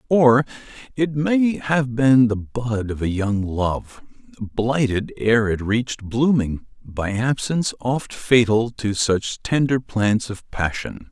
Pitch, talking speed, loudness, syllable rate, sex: 120 Hz, 135 wpm, -20 LUFS, 3.5 syllables/s, male